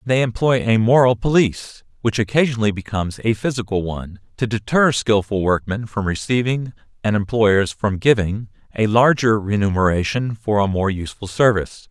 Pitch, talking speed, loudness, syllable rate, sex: 110 Hz, 150 wpm, -19 LUFS, 5.5 syllables/s, male